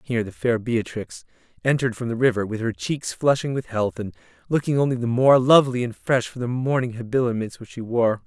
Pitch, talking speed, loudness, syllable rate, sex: 120 Hz, 210 wpm, -22 LUFS, 5.8 syllables/s, male